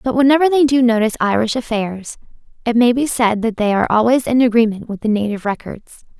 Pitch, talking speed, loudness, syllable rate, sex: 235 Hz, 205 wpm, -16 LUFS, 6.3 syllables/s, female